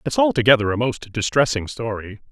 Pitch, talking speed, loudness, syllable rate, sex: 120 Hz, 155 wpm, -20 LUFS, 5.7 syllables/s, male